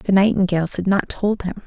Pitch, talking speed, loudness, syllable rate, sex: 190 Hz, 215 wpm, -19 LUFS, 5.6 syllables/s, female